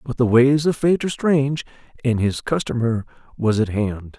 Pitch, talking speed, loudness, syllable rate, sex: 125 Hz, 185 wpm, -20 LUFS, 5.0 syllables/s, male